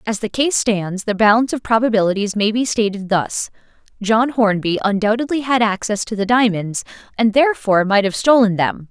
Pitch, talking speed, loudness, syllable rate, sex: 215 Hz, 175 wpm, -17 LUFS, 5.4 syllables/s, female